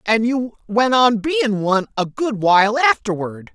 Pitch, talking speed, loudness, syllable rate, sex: 225 Hz, 170 wpm, -17 LUFS, 4.6 syllables/s, female